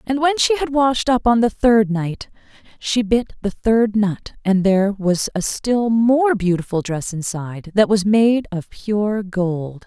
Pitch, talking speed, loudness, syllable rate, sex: 215 Hz, 180 wpm, -18 LUFS, 3.9 syllables/s, female